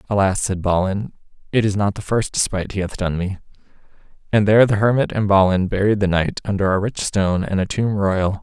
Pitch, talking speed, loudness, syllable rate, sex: 100 Hz, 215 wpm, -19 LUFS, 5.8 syllables/s, male